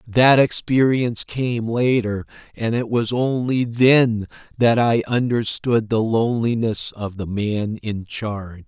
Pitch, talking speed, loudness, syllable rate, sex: 115 Hz, 130 wpm, -20 LUFS, 3.8 syllables/s, male